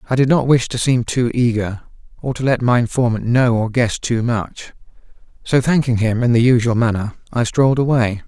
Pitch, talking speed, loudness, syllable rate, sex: 120 Hz, 205 wpm, -17 LUFS, 5.3 syllables/s, male